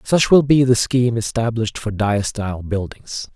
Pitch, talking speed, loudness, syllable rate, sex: 115 Hz, 160 wpm, -18 LUFS, 5.0 syllables/s, male